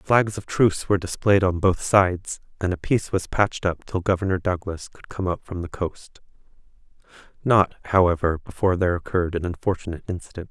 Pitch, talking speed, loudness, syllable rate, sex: 90 Hz, 175 wpm, -23 LUFS, 6.0 syllables/s, male